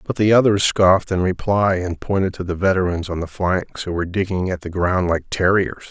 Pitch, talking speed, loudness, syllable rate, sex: 95 Hz, 225 wpm, -19 LUFS, 5.5 syllables/s, male